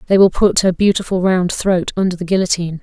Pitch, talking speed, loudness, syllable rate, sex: 185 Hz, 215 wpm, -15 LUFS, 6.2 syllables/s, female